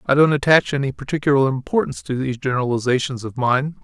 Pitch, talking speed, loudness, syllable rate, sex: 135 Hz, 170 wpm, -19 LUFS, 6.8 syllables/s, male